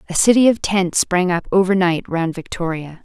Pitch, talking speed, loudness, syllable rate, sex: 180 Hz, 180 wpm, -17 LUFS, 5.0 syllables/s, female